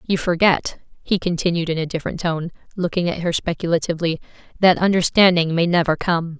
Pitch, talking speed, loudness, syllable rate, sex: 170 Hz, 160 wpm, -19 LUFS, 5.9 syllables/s, female